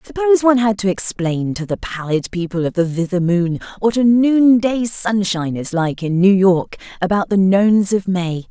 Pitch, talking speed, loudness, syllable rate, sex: 195 Hz, 190 wpm, -16 LUFS, 5.0 syllables/s, female